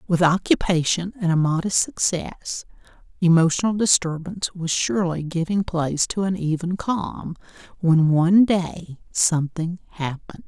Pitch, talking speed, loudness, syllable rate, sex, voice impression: 175 Hz, 120 wpm, -21 LUFS, 4.7 syllables/s, female, very feminine, slightly old, slightly thin, very relaxed, weak, dark, very soft, very clear, very fluent, slightly raspy, slightly cute, cool, very refreshing, very sincere, very calm, very friendly, very reassuring, very unique, very elegant, slightly wild, very sweet, lively, very kind, modest